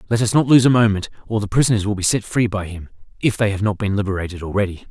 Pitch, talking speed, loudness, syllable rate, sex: 105 Hz, 255 wpm, -18 LUFS, 7.2 syllables/s, male